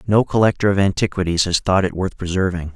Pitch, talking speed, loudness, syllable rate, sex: 95 Hz, 195 wpm, -18 LUFS, 6.1 syllables/s, male